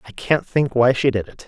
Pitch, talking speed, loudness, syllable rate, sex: 125 Hz, 285 wpm, -19 LUFS, 5.4 syllables/s, male